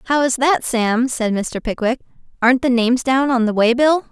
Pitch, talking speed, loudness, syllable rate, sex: 250 Hz, 220 wpm, -17 LUFS, 5.2 syllables/s, female